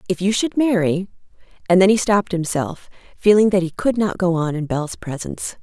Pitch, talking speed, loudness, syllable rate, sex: 190 Hz, 205 wpm, -19 LUFS, 5.6 syllables/s, female